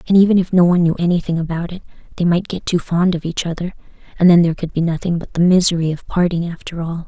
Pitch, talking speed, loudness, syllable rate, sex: 170 Hz, 255 wpm, -17 LUFS, 6.9 syllables/s, female